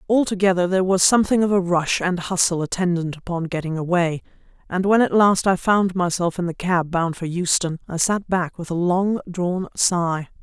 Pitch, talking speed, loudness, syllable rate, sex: 180 Hz, 195 wpm, -20 LUFS, 5.1 syllables/s, female